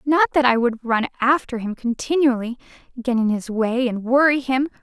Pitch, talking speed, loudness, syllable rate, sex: 250 Hz, 185 wpm, -20 LUFS, 5.0 syllables/s, female